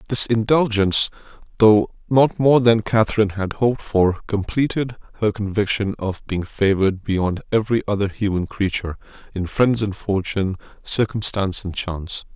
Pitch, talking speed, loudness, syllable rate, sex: 105 Hz, 135 wpm, -20 LUFS, 5.2 syllables/s, male